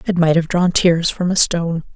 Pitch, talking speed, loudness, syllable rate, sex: 170 Hz, 245 wpm, -16 LUFS, 5.2 syllables/s, female